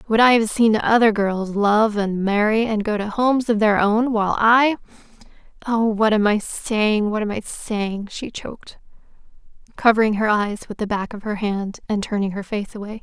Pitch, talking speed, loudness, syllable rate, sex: 215 Hz, 195 wpm, -19 LUFS, 4.9 syllables/s, female